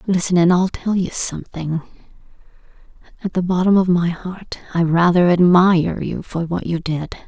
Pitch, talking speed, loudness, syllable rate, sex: 175 Hz, 155 wpm, -18 LUFS, 5.0 syllables/s, female